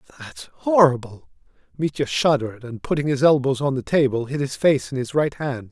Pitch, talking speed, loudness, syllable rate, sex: 135 Hz, 190 wpm, -21 LUFS, 5.4 syllables/s, male